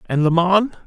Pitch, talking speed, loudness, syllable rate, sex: 180 Hz, 210 wpm, -17 LUFS, 4.4 syllables/s, male